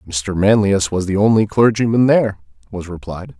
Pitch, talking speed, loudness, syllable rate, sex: 100 Hz, 160 wpm, -15 LUFS, 5.2 syllables/s, male